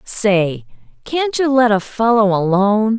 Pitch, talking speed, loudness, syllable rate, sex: 215 Hz, 140 wpm, -15 LUFS, 4.0 syllables/s, female